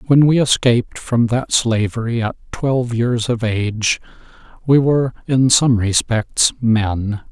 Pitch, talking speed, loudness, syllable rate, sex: 120 Hz, 140 wpm, -17 LUFS, 4.1 syllables/s, male